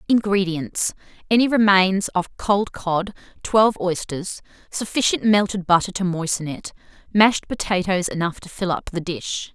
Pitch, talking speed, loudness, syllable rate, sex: 190 Hz, 130 wpm, -21 LUFS, 4.5 syllables/s, female